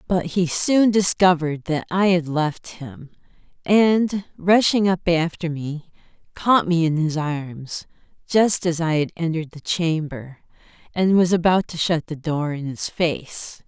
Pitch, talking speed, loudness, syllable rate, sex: 170 Hz, 160 wpm, -20 LUFS, 4.0 syllables/s, female